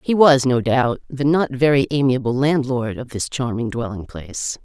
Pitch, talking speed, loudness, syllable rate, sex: 130 Hz, 180 wpm, -19 LUFS, 4.8 syllables/s, female